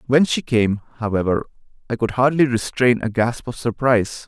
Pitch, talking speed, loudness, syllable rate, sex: 120 Hz, 170 wpm, -20 LUFS, 5.2 syllables/s, male